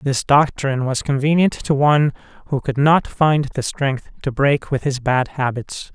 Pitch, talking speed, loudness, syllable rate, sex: 140 Hz, 180 wpm, -18 LUFS, 4.5 syllables/s, male